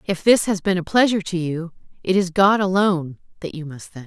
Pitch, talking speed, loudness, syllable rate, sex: 180 Hz, 235 wpm, -19 LUFS, 5.7 syllables/s, female